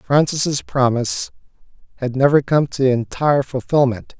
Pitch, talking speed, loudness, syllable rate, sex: 135 Hz, 115 wpm, -18 LUFS, 4.6 syllables/s, male